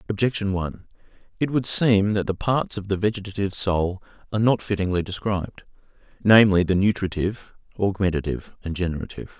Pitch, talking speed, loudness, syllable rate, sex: 100 Hz, 135 wpm, -23 LUFS, 6.3 syllables/s, male